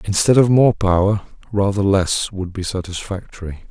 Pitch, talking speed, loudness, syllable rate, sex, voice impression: 100 Hz, 145 wpm, -18 LUFS, 4.8 syllables/s, male, masculine, adult-like, thick, tensed, powerful, dark, clear, cool, calm, mature, wild, lively, strict